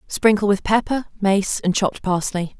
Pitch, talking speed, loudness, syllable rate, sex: 200 Hz, 160 wpm, -20 LUFS, 4.6 syllables/s, female